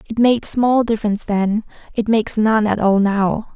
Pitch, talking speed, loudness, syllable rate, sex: 215 Hz, 185 wpm, -17 LUFS, 4.9 syllables/s, female